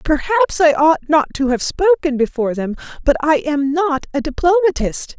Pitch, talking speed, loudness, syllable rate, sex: 315 Hz, 175 wpm, -16 LUFS, 4.7 syllables/s, female